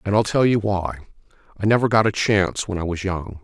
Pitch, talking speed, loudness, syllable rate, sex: 100 Hz, 245 wpm, -20 LUFS, 5.9 syllables/s, male